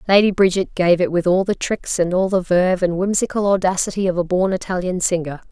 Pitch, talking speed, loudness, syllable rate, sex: 185 Hz, 220 wpm, -18 LUFS, 5.9 syllables/s, female